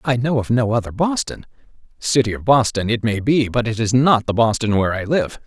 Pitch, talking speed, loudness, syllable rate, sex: 120 Hz, 230 wpm, -18 LUFS, 5.6 syllables/s, male